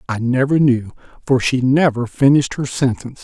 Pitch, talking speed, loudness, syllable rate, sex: 130 Hz, 165 wpm, -16 LUFS, 5.5 syllables/s, male